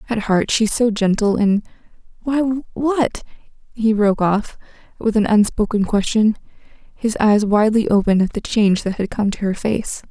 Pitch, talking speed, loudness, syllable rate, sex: 215 Hz, 155 wpm, -18 LUFS, 5.3 syllables/s, female